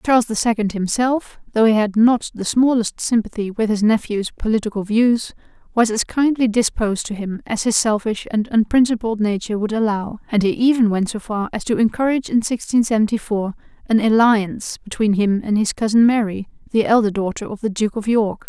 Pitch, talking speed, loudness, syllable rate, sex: 220 Hz, 190 wpm, -18 LUFS, 5.5 syllables/s, female